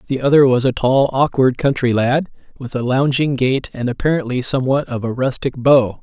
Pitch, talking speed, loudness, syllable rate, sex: 130 Hz, 190 wpm, -17 LUFS, 5.3 syllables/s, male